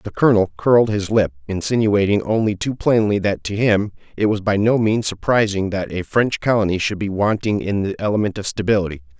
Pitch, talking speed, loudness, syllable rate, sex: 105 Hz, 195 wpm, -19 LUFS, 5.6 syllables/s, male